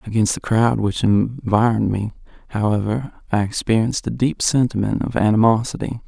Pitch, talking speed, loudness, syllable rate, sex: 110 Hz, 140 wpm, -19 LUFS, 5.4 syllables/s, male